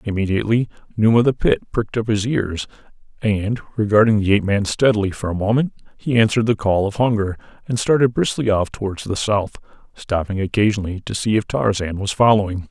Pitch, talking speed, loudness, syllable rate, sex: 105 Hz, 185 wpm, -19 LUFS, 6.1 syllables/s, male